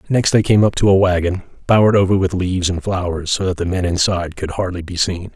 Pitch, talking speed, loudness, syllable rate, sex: 90 Hz, 245 wpm, -17 LUFS, 6.3 syllables/s, male